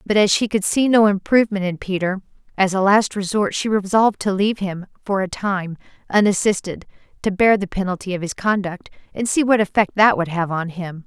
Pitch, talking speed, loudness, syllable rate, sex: 195 Hz, 205 wpm, -19 LUFS, 5.6 syllables/s, female